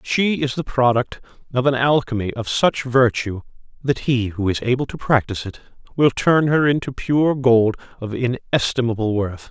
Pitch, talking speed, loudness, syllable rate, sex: 125 Hz, 170 wpm, -19 LUFS, 4.8 syllables/s, male